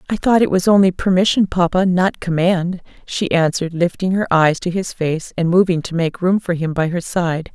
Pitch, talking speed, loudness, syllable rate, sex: 175 Hz, 215 wpm, -17 LUFS, 5.1 syllables/s, female